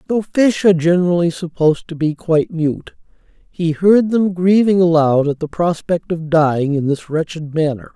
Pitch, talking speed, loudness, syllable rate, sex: 165 Hz, 175 wpm, -16 LUFS, 5.0 syllables/s, male